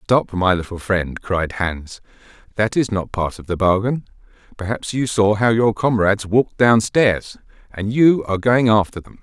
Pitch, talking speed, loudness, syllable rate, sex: 105 Hz, 180 wpm, -18 LUFS, 4.6 syllables/s, male